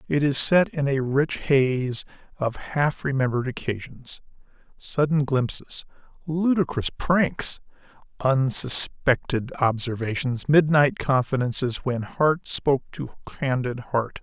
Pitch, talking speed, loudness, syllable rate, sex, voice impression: 135 Hz, 105 wpm, -23 LUFS, 3.9 syllables/s, male, very masculine, slightly old, very thick, tensed, slightly powerful, bright, soft, muffled, fluent, slightly raspy, cool, intellectual, slightly refreshing, sincere, calm, very mature, friendly, reassuring, very unique, slightly elegant, very wild, slightly sweet, lively, kind, slightly modest